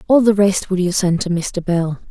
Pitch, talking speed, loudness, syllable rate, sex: 185 Hz, 255 wpm, -17 LUFS, 4.9 syllables/s, female